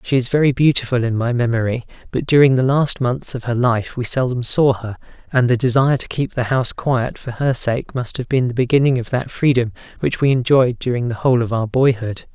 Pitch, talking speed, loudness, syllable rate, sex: 125 Hz, 230 wpm, -18 LUFS, 5.7 syllables/s, male